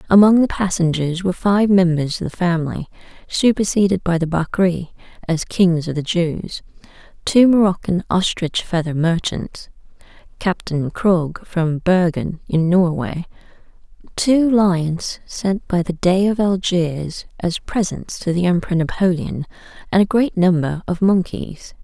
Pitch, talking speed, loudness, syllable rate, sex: 180 Hz, 135 wpm, -18 LUFS, 4.2 syllables/s, female